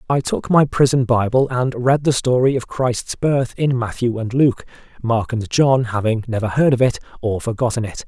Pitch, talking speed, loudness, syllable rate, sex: 125 Hz, 200 wpm, -18 LUFS, 4.9 syllables/s, male